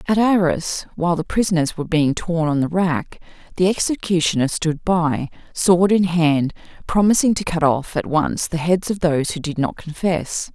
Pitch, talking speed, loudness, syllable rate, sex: 170 Hz, 180 wpm, -19 LUFS, 4.8 syllables/s, female